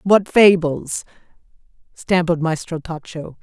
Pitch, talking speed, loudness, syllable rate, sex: 170 Hz, 90 wpm, -18 LUFS, 4.1 syllables/s, female